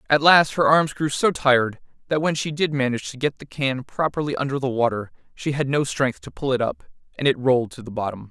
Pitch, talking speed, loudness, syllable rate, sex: 135 Hz, 245 wpm, -22 LUFS, 5.9 syllables/s, male